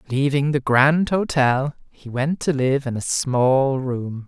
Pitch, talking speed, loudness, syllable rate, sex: 135 Hz, 170 wpm, -20 LUFS, 3.5 syllables/s, male